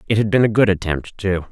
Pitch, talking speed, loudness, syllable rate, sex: 100 Hz, 275 wpm, -18 LUFS, 6.0 syllables/s, male